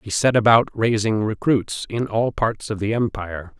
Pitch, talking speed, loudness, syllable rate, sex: 110 Hz, 185 wpm, -20 LUFS, 4.7 syllables/s, male